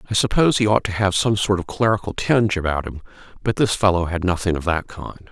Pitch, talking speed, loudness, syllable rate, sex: 95 Hz, 235 wpm, -20 LUFS, 6.2 syllables/s, male